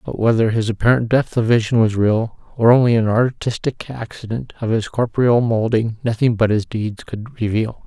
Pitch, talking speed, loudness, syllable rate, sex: 115 Hz, 185 wpm, -18 LUFS, 5.1 syllables/s, male